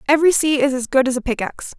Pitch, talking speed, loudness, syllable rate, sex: 270 Hz, 270 wpm, -18 LUFS, 7.5 syllables/s, female